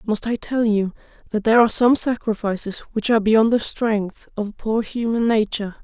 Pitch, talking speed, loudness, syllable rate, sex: 220 Hz, 185 wpm, -20 LUFS, 5.3 syllables/s, female